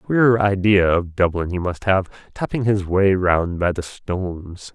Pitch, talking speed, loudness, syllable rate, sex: 95 Hz, 175 wpm, -19 LUFS, 4.0 syllables/s, male